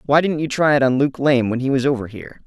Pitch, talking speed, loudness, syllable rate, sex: 135 Hz, 315 wpm, -18 LUFS, 6.5 syllables/s, male